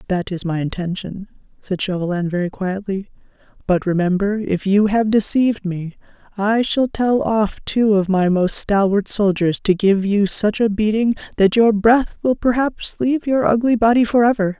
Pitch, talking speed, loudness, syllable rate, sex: 205 Hz, 175 wpm, -18 LUFS, 4.7 syllables/s, female